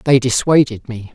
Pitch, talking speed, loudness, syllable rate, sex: 125 Hz, 155 wpm, -15 LUFS, 4.9 syllables/s, male